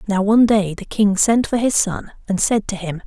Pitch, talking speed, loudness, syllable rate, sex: 205 Hz, 255 wpm, -17 LUFS, 5.1 syllables/s, female